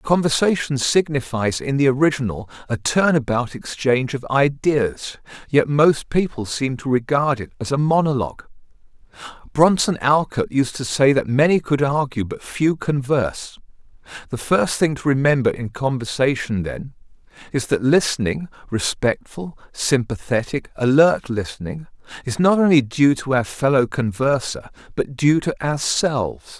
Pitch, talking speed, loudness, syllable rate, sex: 135 Hz, 130 wpm, -19 LUFS, 4.6 syllables/s, male